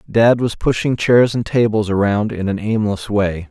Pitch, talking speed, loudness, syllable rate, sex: 105 Hz, 190 wpm, -16 LUFS, 4.5 syllables/s, male